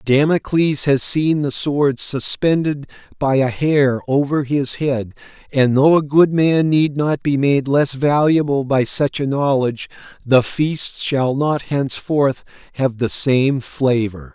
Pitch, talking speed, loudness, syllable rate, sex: 140 Hz, 150 wpm, -17 LUFS, 3.8 syllables/s, male